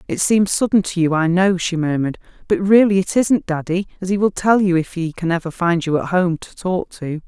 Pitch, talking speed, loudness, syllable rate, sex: 180 Hz, 240 wpm, -18 LUFS, 5.4 syllables/s, female